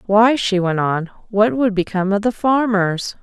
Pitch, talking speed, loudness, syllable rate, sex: 205 Hz, 185 wpm, -17 LUFS, 4.6 syllables/s, female